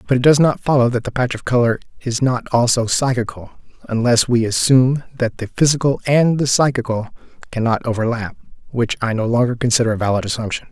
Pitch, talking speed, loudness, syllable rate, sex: 120 Hz, 185 wpm, -17 LUFS, 5.9 syllables/s, male